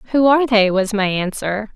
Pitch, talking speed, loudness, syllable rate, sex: 215 Hz, 205 wpm, -17 LUFS, 4.8 syllables/s, female